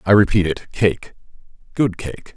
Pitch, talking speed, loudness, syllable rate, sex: 95 Hz, 125 wpm, -19 LUFS, 4.4 syllables/s, male